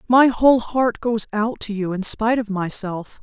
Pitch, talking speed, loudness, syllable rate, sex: 220 Hz, 205 wpm, -20 LUFS, 4.7 syllables/s, female